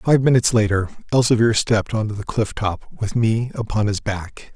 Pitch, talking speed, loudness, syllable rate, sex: 110 Hz, 195 wpm, -20 LUFS, 5.2 syllables/s, male